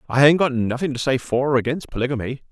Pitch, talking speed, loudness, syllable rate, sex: 135 Hz, 240 wpm, -20 LUFS, 6.8 syllables/s, male